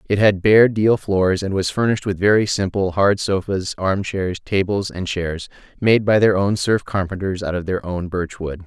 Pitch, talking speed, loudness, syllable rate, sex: 95 Hz, 195 wpm, -19 LUFS, 4.6 syllables/s, male